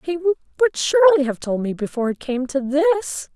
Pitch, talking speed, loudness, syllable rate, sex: 300 Hz, 195 wpm, -20 LUFS, 5.5 syllables/s, female